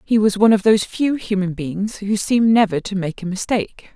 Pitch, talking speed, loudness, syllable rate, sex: 205 Hz, 230 wpm, -18 LUFS, 5.5 syllables/s, female